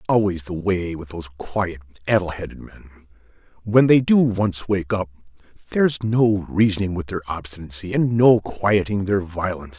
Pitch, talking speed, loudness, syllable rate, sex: 95 Hz, 165 wpm, -21 LUFS, 5.6 syllables/s, male